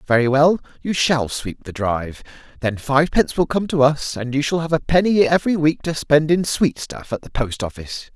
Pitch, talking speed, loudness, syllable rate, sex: 145 Hz, 215 wpm, -19 LUFS, 5.4 syllables/s, male